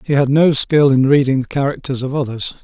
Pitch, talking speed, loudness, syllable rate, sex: 135 Hz, 225 wpm, -15 LUFS, 5.6 syllables/s, male